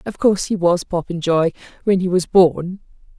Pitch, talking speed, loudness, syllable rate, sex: 180 Hz, 170 wpm, -18 LUFS, 5.0 syllables/s, female